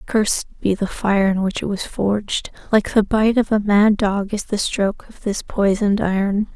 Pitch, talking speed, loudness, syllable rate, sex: 205 Hz, 210 wpm, -19 LUFS, 4.7 syllables/s, female